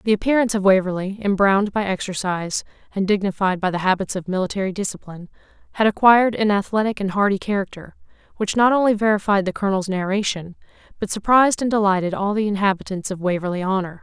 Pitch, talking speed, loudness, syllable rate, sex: 200 Hz, 165 wpm, -20 LUFS, 6.7 syllables/s, female